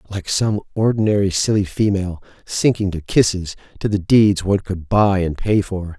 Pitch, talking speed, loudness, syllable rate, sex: 100 Hz, 170 wpm, -18 LUFS, 5.0 syllables/s, male